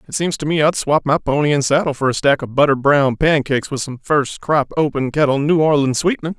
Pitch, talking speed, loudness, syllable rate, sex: 145 Hz, 245 wpm, -17 LUFS, 6.0 syllables/s, male